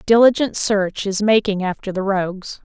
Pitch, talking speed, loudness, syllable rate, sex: 200 Hz, 155 wpm, -18 LUFS, 4.8 syllables/s, female